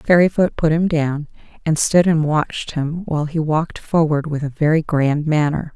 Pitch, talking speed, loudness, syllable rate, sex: 155 Hz, 190 wpm, -18 LUFS, 4.9 syllables/s, female